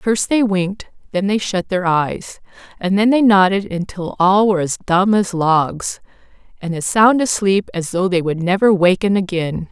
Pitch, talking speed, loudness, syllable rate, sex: 190 Hz, 185 wpm, -16 LUFS, 4.6 syllables/s, female